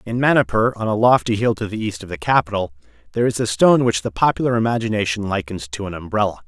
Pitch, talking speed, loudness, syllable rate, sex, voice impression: 105 Hz, 220 wpm, -19 LUFS, 6.7 syllables/s, male, masculine, adult-like, slightly thick, cool, slightly intellectual, friendly